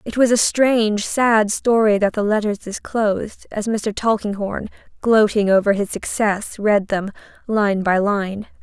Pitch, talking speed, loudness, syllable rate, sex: 210 Hz, 155 wpm, -19 LUFS, 4.2 syllables/s, female